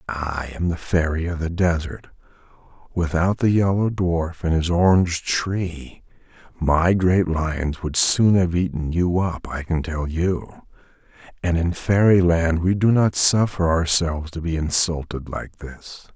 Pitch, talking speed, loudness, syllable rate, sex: 85 Hz, 150 wpm, -21 LUFS, 4.0 syllables/s, male